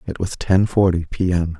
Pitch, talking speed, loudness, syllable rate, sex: 90 Hz, 225 wpm, -19 LUFS, 5.0 syllables/s, male